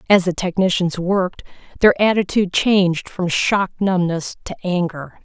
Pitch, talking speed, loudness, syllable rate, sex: 185 Hz, 135 wpm, -18 LUFS, 4.9 syllables/s, female